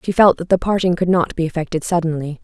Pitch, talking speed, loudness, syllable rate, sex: 170 Hz, 245 wpm, -18 LUFS, 6.4 syllables/s, female